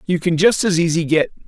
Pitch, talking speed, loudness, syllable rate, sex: 170 Hz, 245 wpm, -17 LUFS, 5.9 syllables/s, male